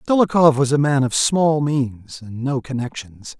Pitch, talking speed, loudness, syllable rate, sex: 140 Hz, 175 wpm, -18 LUFS, 4.4 syllables/s, male